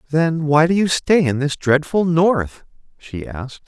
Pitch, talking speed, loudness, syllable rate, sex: 155 Hz, 180 wpm, -17 LUFS, 4.3 syllables/s, male